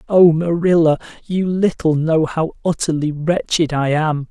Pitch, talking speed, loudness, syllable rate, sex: 160 Hz, 140 wpm, -17 LUFS, 4.2 syllables/s, male